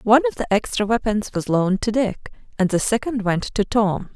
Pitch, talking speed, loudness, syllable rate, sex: 215 Hz, 215 wpm, -21 LUFS, 5.6 syllables/s, female